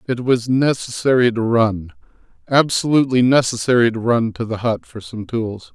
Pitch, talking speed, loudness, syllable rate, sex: 120 Hz, 155 wpm, -17 LUFS, 5.0 syllables/s, male